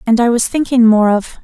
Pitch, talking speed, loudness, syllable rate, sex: 235 Hz, 250 wpm, -12 LUFS, 5.6 syllables/s, female